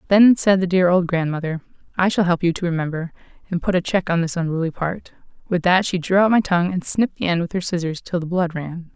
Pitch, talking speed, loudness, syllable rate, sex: 175 Hz, 255 wpm, -20 LUFS, 6.1 syllables/s, female